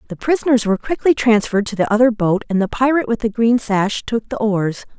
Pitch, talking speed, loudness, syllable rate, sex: 225 Hz, 230 wpm, -17 LUFS, 6.1 syllables/s, female